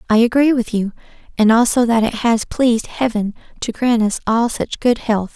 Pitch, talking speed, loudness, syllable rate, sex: 230 Hz, 200 wpm, -17 LUFS, 5.0 syllables/s, female